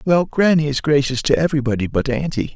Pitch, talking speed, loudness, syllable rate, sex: 145 Hz, 190 wpm, -18 LUFS, 6.2 syllables/s, male